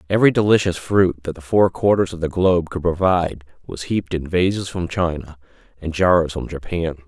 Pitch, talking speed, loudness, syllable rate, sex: 85 Hz, 185 wpm, -19 LUFS, 5.6 syllables/s, male